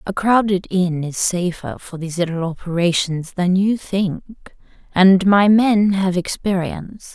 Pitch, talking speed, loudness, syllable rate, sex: 185 Hz, 145 wpm, -18 LUFS, 4.1 syllables/s, female